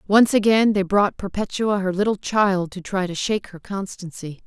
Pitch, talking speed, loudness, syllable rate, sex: 195 Hz, 190 wpm, -21 LUFS, 4.9 syllables/s, female